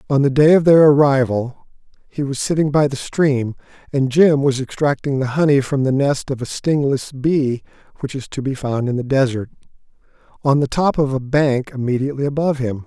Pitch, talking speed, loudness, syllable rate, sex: 135 Hz, 195 wpm, -17 LUFS, 5.3 syllables/s, male